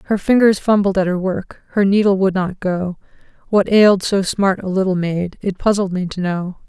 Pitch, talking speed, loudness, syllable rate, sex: 190 Hz, 205 wpm, -17 LUFS, 5.0 syllables/s, female